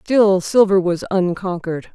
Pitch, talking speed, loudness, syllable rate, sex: 190 Hz, 125 wpm, -17 LUFS, 4.4 syllables/s, female